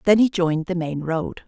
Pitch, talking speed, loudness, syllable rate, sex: 175 Hz, 245 wpm, -22 LUFS, 5.2 syllables/s, female